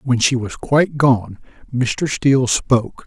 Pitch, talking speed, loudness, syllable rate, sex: 130 Hz, 155 wpm, -17 LUFS, 4.2 syllables/s, male